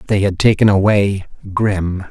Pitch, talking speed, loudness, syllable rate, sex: 100 Hz, 140 wpm, -15 LUFS, 3.9 syllables/s, male